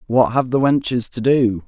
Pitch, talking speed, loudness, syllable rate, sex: 120 Hz, 215 wpm, -17 LUFS, 4.7 syllables/s, male